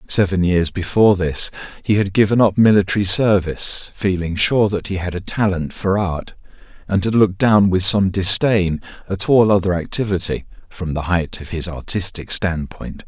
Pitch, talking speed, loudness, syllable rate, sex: 95 Hz, 170 wpm, -17 LUFS, 4.9 syllables/s, male